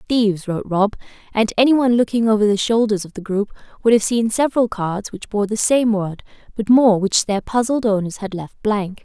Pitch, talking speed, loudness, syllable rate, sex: 215 Hz, 210 wpm, -18 LUFS, 5.5 syllables/s, female